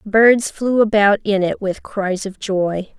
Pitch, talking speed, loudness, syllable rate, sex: 205 Hz, 180 wpm, -17 LUFS, 3.6 syllables/s, female